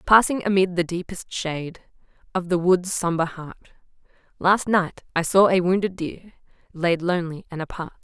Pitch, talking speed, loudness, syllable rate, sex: 175 Hz, 155 wpm, -22 LUFS, 5.1 syllables/s, female